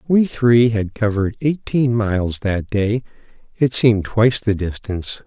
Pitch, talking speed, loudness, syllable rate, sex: 110 Hz, 150 wpm, -18 LUFS, 4.6 syllables/s, male